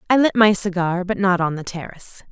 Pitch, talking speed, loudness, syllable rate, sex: 190 Hz, 235 wpm, -19 LUFS, 5.9 syllables/s, female